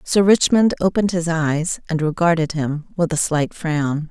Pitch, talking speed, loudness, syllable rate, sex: 165 Hz, 175 wpm, -19 LUFS, 4.5 syllables/s, female